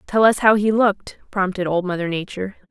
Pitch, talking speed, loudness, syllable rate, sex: 195 Hz, 200 wpm, -19 LUFS, 6.0 syllables/s, female